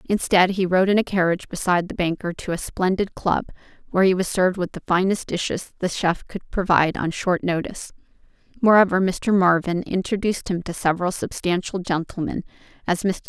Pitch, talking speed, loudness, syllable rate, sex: 185 Hz, 175 wpm, -22 LUFS, 5.8 syllables/s, female